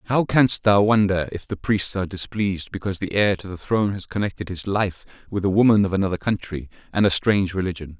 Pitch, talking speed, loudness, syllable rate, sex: 95 Hz, 220 wpm, -22 LUFS, 6.2 syllables/s, male